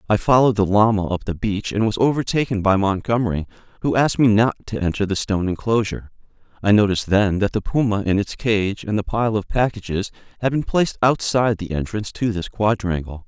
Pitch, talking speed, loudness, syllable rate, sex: 105 Hz, 200 wpm, -20 LUFS, 6.1 syllables/s, male